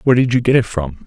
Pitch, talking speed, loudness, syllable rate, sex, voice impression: 110 Hz, 340 wpm, -16 LUFS, 7.2 syllables/s, male, very masculine, slightly old, thick, intellectual, sincere, very calm, mature, slightly wild, slightly kind